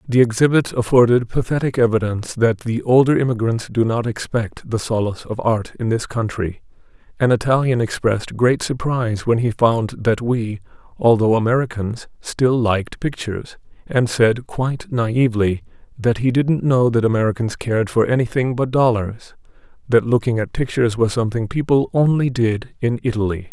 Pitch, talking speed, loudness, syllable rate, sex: 120 Hz, 150 wpm, -19 LUFS, 5.2 syllables/s, male